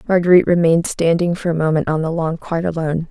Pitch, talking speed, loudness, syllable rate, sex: 165 Hz, 215 wpm, -17 LUFS, 7.2 syllables/s, female